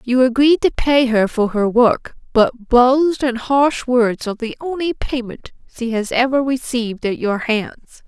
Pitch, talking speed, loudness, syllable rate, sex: 245 Hz, 180 wpm, -17 LUFS, 4.2 syllables/s, female